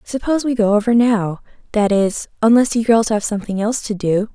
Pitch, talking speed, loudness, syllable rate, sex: 220 Hz, 205 wpm, -17 LUFS, 5.8 syllables/s, female